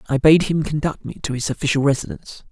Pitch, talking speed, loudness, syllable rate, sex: 145 Hz, 215 wpm, -19 LUFS, 6.6 syllables/s, male